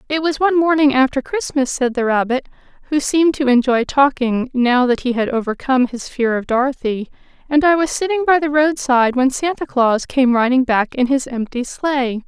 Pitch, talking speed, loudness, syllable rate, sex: 265 Hz, 200 wpm, -17 LUFS, 5.2 syllables/s, female